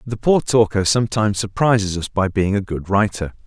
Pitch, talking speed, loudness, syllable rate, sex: 105 Hz, 190 wpm, -18 LUFS, 5.5 syllables/s, male